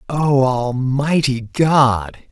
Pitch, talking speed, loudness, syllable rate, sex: 135 Hz, 80 wpm, -17 LUFS, 2.4 syllables/s, male